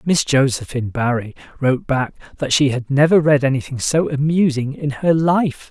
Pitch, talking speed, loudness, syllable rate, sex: 140 Hz, 170 wpm, -18 LUFS, 5.0 syllables/s, male